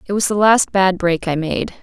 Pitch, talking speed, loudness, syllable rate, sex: 190 Hz, 265 wpm, -16 LUFS, 5.1 syllables/s, female